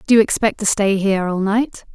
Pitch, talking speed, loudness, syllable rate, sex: 205 Hz, 245 wpm, -17 LUFS, 5.7 syllables/s, female